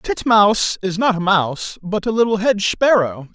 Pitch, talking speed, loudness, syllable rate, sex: 200 Hz, 180 wpm, -17 LUFS, 5.0 syllables/s, male